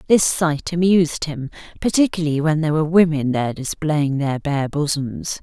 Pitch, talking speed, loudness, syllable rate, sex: 155 Hz, 155 wpm, -19 LUFS, 5.3 syllables/s, female